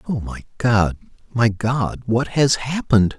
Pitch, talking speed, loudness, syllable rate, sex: 120 Hz, 150 wpm, -20 LUFS, 4.0 syllables/s, male